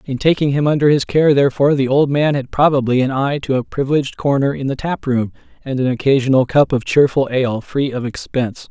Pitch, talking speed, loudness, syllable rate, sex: 135 Hz, 220 wpm, -16 LUFS, 6.1 syllables/s, male